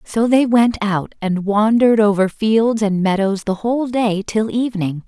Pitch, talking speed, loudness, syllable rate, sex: 215 Hz, 175 wpm, -17 LUFS, 4.5 syllables/s, female